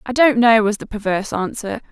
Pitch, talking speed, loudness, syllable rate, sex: 220 Hz, 220 wpm, -17 LUFS, 5.7 syllables/s, female